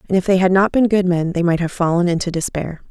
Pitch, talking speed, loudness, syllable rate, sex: 180 Hz, 290 wpm, -17 LUFS, 6.3 syllables/s, female